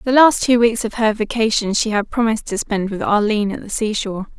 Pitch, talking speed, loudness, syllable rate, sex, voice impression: 220 Hz, 245 wpm, -18 LUFS, 6.0 syllables/s, female, feminine, adult-like, slightly clear, slightly intellectual, friendly